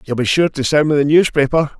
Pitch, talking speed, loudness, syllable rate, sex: 145 Hz, 265 wpm, -15 LUFS, 6.2 syllables/s, male